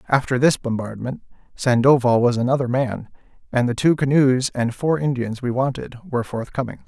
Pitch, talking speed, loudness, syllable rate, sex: 125 Hz, 155 wpm, -20 LUFS, 5.2 syllables/s, male